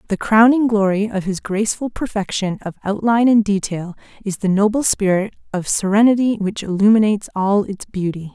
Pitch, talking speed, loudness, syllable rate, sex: 205 Hz, 160 wpm, -17 LUFS, 5.3 syllables/s, female